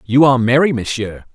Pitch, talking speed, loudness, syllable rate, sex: 125 Hz, 180 wpm, -14 LUFS, 5.9 syllables/s, male